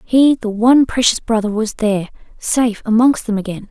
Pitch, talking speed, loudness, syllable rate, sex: 225 Hz, 180 wpm, -15 LUFS, 5.5 syllables/s, female